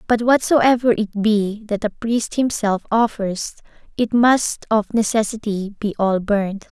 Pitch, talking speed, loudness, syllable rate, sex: 215 Hz, 140 wpm, -19 LUFS, 4.0 syllables/s, female